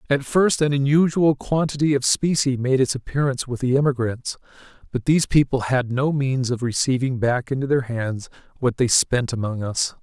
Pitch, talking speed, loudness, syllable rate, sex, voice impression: 130 Hz, 180 wpm, -21 LUFS, 5.1 syllables/s, male, masculine, slightly young, adult-like, slightly thick, slightly tensed, slightly relaxed, weak, slightly dark, slightly hard, muffled, slightly halting, slightly cool, slightly intellectual, refreshing, sincere, calm, slightly mature, slightly friendly, slightly wild, slightly sweet, kind, modest